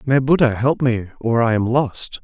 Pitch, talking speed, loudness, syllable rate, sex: 120 Hz, 215 wpm, -18 LUFS, 4.5 syllables/s, male